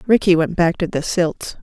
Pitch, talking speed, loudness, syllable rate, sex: 170 Hz, 220 wpm, -18 LUFS, 4.8 syllables/s, female